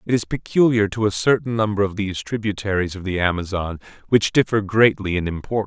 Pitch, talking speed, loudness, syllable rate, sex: 100 Hz, 190 wpm, -20 LUFS, 6.3 syllables/s, male